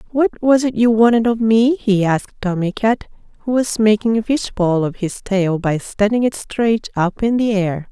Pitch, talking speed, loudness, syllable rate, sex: 215 Hz, 205 wpm, -17 LUFS, 4.8 syllables/s, female